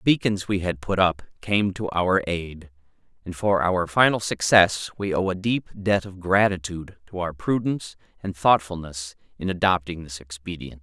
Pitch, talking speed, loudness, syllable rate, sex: 90 Hz, 170 wpm, -23 LUFS, 4.8 syllables/s, male